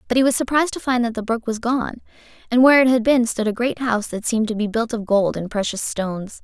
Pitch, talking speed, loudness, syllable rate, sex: 230 Hz, 280 wpm, -20 LUFS, 6.4 syllables/s, female